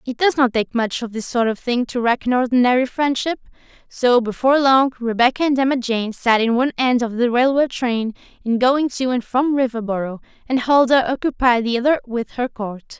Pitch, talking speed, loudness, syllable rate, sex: 245 Hz, 205 wpm, -18 LUFS, 5.3 syllables/s, female